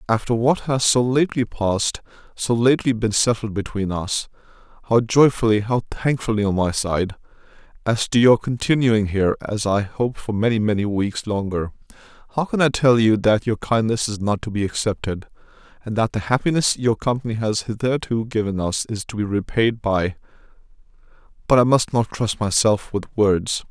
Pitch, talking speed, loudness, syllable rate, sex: 110 Hz, 160 wpm, -20 LUFS, 5.2 syllables/s, male